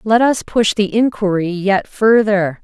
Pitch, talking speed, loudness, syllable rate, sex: 210 Hz, 160 wpm, -15 LUFS, 4.0 syllables/s, female